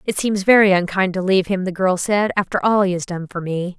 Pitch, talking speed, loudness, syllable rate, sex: 190 Hz, 270 wpm, -18 LUFS, 5.8 syllables/s, female